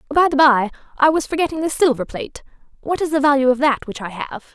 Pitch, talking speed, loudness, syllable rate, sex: 280 Hz, 240 wpm, -18 LUFS, 6.4 syllables/s, female